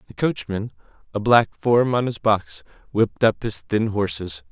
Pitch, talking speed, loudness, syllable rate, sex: 110 Hz, 175 wpm, -21 LUFS, 4.5 syllables/s, male